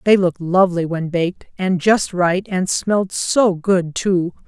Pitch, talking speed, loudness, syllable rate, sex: 185 Hz, 175 wpm, -18 LUFS, 4.3 syllables/s, female